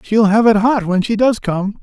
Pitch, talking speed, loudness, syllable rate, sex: 215 Hz, 260 wpm, -14 LUFS, 4.8 syllables/s, male